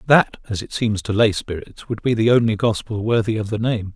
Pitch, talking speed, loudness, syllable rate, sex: 110 Hz, 245 wpm, -20 LUFS, 5.4 syllables/s, male